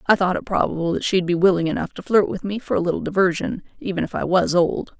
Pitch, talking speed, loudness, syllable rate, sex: 185 Hz, 265 wpm, -21 LUFS, 6.4 syllables/s, female